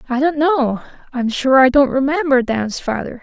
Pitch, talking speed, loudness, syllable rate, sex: 265 Hz, 185 wpm, -16 LUFS, 4.7 syllables/s, female